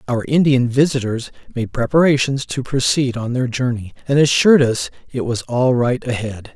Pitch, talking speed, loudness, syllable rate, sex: 125 Hz, 165 wpm, -17 LUFS, 4.9 syllables/s, male